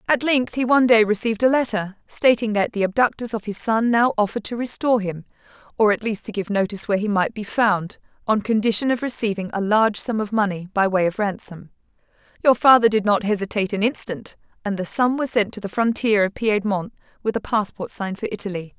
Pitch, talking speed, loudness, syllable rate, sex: 215 Hz, 215 wpm, -21 LUFS, 6.1 syllables/s, female